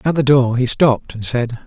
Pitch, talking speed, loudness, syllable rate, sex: 125 Hz, 250 wpm, -16 LUFS, 5.2 syllables/s, male